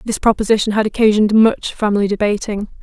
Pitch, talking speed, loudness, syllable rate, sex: 210 Hz, 150 wpm, -15 LUFS, 6.5 syllables/s, female